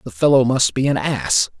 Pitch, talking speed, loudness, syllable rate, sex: 125 Hz, 225 wpm, -17 LUFS, 4.9 syllables/s, male